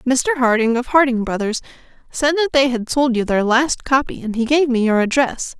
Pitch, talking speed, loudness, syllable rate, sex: 255 Hz, 215 wpm, -17 LUFS, 5.1 syllables/s, female